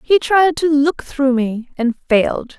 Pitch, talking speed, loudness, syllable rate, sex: 280 Hz, 185 wpm, -16 LUFS, 4.0 syllables/s, female